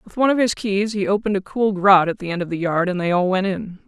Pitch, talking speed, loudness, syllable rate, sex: 195 Hz, 325 wpm, -19 LUFS, 6.5 syllables/s, female